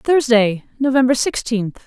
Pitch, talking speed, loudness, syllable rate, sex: 240 Hz, 95 wpm, -17 LUFS, 4.1 syllables/s, female